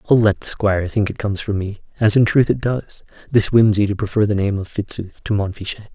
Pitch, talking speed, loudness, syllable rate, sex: 105 Hz, 220 wpm, -19 LUFS, 6.1 syllables/s, male